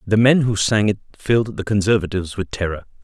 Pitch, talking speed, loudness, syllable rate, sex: 105 Hz, 200 wpm, -19 LUFS, 6.2 syllables/s, male